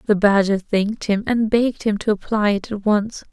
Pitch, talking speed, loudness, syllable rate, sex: 210 Hz, 215 wpm, -19 LUFS, 5.2 syllables/s, female